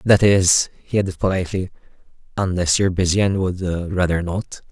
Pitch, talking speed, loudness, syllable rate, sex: 90 Hz, 155 wpm, -19 LUFS, 5.2 syllables/s, male